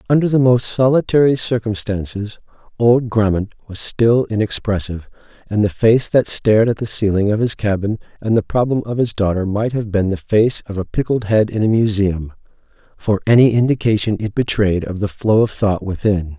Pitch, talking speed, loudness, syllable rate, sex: 110 Hz, 185 wpm, -17 LUFS, 5.2 syllables/s, male